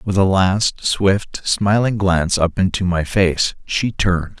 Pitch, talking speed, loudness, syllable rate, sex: 95 Hz, 165 wpm, -17 LUFS, 3.8 syllables/s, male